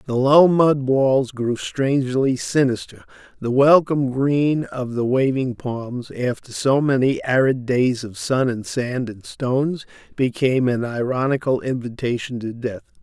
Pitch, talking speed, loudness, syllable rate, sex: 130 Hz, 145 wpm, -20 LUFS, 4.2 syllables/s, male